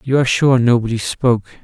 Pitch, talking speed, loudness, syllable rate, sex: 120 Hz, 185 wpm, -15 LUFS, 5.9 syllables/s, male